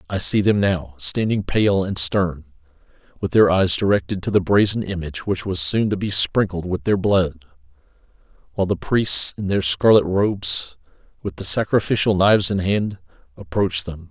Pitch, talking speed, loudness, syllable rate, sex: 95 Hz, 170 wpm, -19 LUFS, 5.0 syllables/s, male